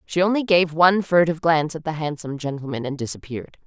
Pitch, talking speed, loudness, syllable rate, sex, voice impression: 160 Hz, 195 wpm, -21 LUFS, 6.9 syllables/s, female, feminine, very adult-like, slightly fluent, intellectual, slightly sharp